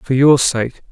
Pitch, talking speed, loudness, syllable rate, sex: 130 Hz, 195 wpm, -14 LUFS, 4.0 syllables/s, male